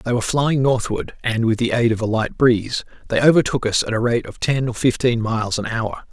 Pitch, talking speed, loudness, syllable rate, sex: 115 Hz, 245 wpm, -19 LUFS, 5.6 syllables/s, male